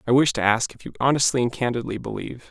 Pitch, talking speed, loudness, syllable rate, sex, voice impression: 125 Hz, 240 wpm, -23 LUFS, 7.0 syllables/s, male, very masculine, very adult-like, slightly old, very thick, tensed, very powerful, slightly bright, hard, muffled, slightly fluent, raspy, very cool, intellectual, slightly refreshing, sincere, very calm, very mature, very friendly, very reassuring, unique, elegant, wild, slightly sweet, slightly lively, very kind, slightly modest